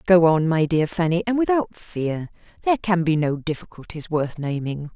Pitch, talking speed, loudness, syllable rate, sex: 170 Hz, 180 wpm, -22 LUFS, 5.0 syllables/s, female